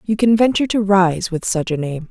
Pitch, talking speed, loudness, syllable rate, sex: 190 Hz, 255 wpm, -17 LUFS, 5.5 syllables/s, female